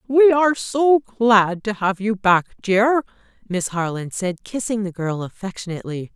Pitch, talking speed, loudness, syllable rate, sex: 210 Hz, 155 wpm, -20 LUFS, 4.5 syllables/s, female